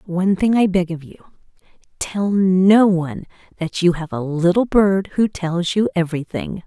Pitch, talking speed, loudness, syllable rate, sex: 185 Hz, 170 wpm, -18 LUFS, 4.7 syllables/s, female